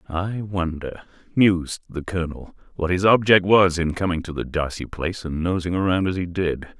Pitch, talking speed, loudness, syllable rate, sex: 90 Hz, 185 wpm, -22 LUFS, 5.1 syllables/s, male